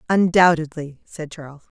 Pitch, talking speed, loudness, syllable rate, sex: 160 Hz, 100 wpm, -17 LUFS, 4.9 syllables/s, female